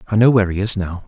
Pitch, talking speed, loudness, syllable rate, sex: 100 Hz, 335 wpm, -16 LUFS, 8.2 syllables/s, male